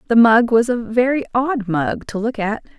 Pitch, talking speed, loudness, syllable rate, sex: 230 Hz, 215 wpm, -17 LUFS, 4.6 syllables/s, female